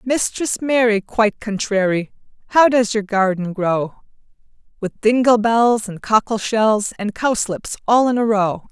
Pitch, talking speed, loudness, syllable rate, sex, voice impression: 220 Hz, 145 wpm, -18 LUFS, 4.1 syllables/s, female, feminine, adult-like, slightly clear, slightly intellectual, slightly refreshing